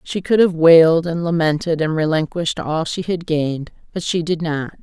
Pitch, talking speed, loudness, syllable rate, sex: 165 Hz, 200 wpm, -17 LUFS, 5.2 syllables/s, female